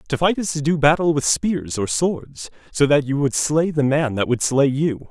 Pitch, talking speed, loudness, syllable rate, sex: 145 Hz, 245 wpm, -19 LUFS, 4.6 syllables/s, male